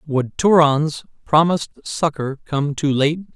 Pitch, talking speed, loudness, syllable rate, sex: 150 Hz, 125 wpm, -18 LUFS, 3.8 syllables/s, male